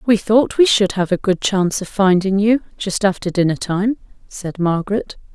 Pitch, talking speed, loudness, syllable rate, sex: 200 Hz, 190 wpm, -17 LUFS, 4.9 syllables/s, female